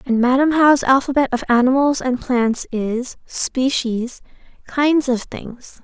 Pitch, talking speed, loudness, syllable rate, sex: 255 Hz, 135 wpm, -18 LUFS, 3.7 syllables/s, female